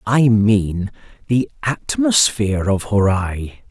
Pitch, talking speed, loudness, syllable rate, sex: 110 Hz, 95 wpm, -17 LUFS, 3.3 syllables/s, male